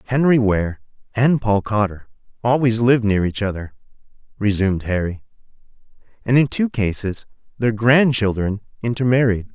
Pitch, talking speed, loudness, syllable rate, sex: 110 Hz, 120 wpm, -19 LUFS, 5.1 syllables/s, male